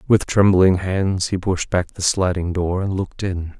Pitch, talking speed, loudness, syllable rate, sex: 90 Hz, 200 wpm, -19 LUFS, 4.4 syllables/s, male